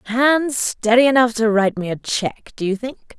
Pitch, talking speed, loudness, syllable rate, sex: 230 Hz, 205 wpm, -18 LUFS, 5.1 syllables/s, female